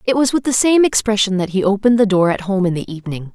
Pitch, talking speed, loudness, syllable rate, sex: 205 Hz, 285 wpm, -16 LUFS, 6.8 syllables/s, female